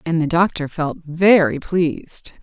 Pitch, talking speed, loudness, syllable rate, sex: 165 Hz, 150 wpm, -18 LUFS, 4.0 syllables/s, female